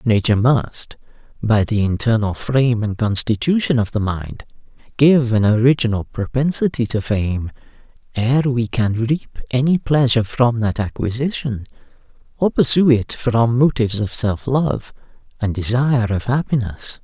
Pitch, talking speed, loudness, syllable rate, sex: 120 Hz, 135 wpm, -18 LUFS, 4.6 syllables/s, male